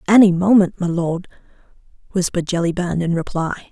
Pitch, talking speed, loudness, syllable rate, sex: 180 Hz, 130 wpm, -18 LUFS, 5.6 syllables/s, female